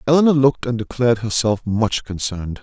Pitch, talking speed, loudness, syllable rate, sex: 120 Hz, 160 wpm, -18 LUFS, 6.0 syllables/s, male